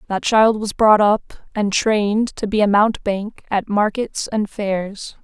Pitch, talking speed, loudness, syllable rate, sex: 210 Hz, 170 wpm, -18 LUFS, 3.9 syllables/s, female